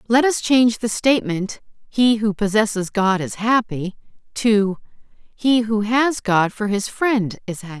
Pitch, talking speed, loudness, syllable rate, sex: 220 Hz, 160 wpm, -19 LUFS, 4.2 syllables/s, female